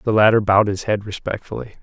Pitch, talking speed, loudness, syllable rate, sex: 105 Hz, 195 wpm, -18 LUFS, 6.8 syllables/s, male